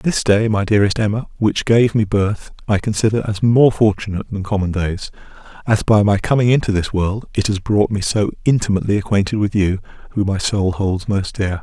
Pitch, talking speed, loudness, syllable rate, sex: 105 Hz, 200 wpm, -17 LUFS, 5.5 syllables/s, male